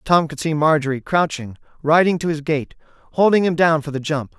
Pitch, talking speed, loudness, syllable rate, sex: 155 Hz, 205 wpm, -18 LUFS, 5.4 syllables/s, male